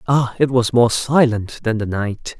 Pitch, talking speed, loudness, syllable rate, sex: 120 Hz, 200 wpm, -17 LUFS, 4.2 syllables/s, male